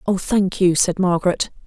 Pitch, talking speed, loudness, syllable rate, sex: 185 Hz, 180 wpm, -18 LUFS, 5.0 syllables/s, female